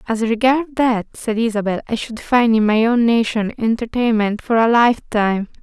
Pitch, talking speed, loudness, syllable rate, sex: 225 Hz, 170 wpm, -17 LUFS, 5.0 syllables/s, female